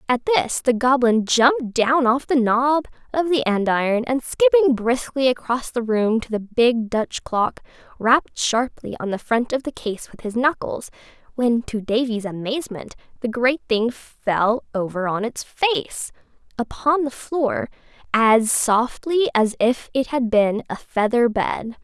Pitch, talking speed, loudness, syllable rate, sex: 245 Hz, 160 wpm, -20 LUFS, 4.1 syllables/s, female